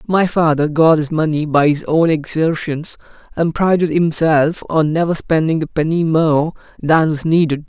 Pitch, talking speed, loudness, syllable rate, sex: 160 Hz, 165 wpm, -15 LUFS, 4.5 syllables/s, male